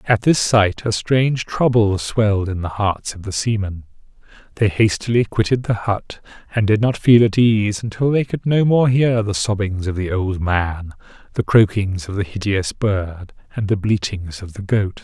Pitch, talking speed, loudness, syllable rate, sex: 105 Hz, 190 wpm, -18 LUFS, 4.5 syllables/s, male